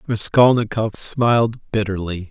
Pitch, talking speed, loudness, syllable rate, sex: 110 Hz, 80 wpm, -18 LUFS, 4.2 syllables/s, male